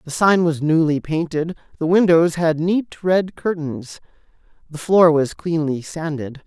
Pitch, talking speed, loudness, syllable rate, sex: 165 Hz, 150 wpm, -19 LUFS, 4.1 syllables/s, male